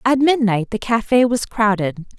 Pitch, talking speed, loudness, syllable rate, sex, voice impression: 225 Hz, 165 wpm, -18 LUFS, 4.5 syllables/s, female, very feminine, slightly young, adult-like, very thin, tensed, slightly powerful, very bright, hard, very clear, very fluent, cute, intellectual, very refreshing, slightly sincere, slightly calm, slightly friendly, slightly reassuring, very unique, slightly elegant, wild, sweet, very lively, strict, slightly intense, sharp, light